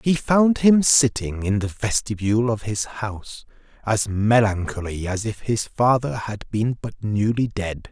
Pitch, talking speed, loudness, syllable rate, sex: 110 Hz, 160 wpm, -21 LUFS, 4.2 syllables/s, male